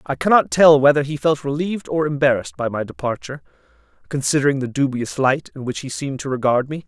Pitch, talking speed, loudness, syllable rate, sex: 140 Hz, 200 wpm, -19 LUFS, 6.5 syllables/s, male